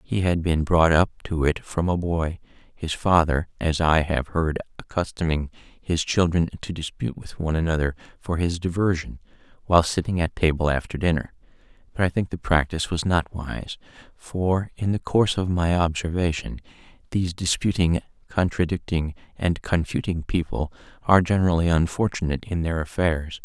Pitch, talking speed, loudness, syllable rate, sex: 85 Hz, 155 wpm, -24 LUFS, 5.2 syllables/s, male